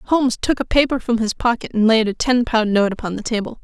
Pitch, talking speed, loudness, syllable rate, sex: 230 Hz, 265 wpm, -18 LUFS, 5.9 syllables/s, female